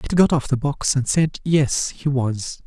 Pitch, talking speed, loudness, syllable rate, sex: 140 Hz, 225 wpm, -20 LUFS, 4.2 syllables/s, male